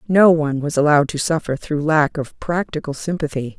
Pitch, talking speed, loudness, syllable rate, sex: 155 Hz, 185 wpm, -19 LUFS, 5.5 syllables/s, female